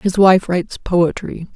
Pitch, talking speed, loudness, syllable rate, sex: 180 Hz, 155 wpm, -16 LUFS, 4.1 syllables/s, female